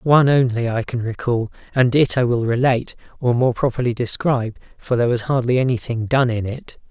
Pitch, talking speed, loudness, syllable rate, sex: 120 Hz, 190 wpm, -19 LUFS, 5.7 syllables/s, male